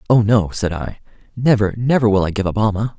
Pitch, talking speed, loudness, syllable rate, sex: 105 Hz, 220 wpm, -17 LUFS, 5.8 syllables/s, male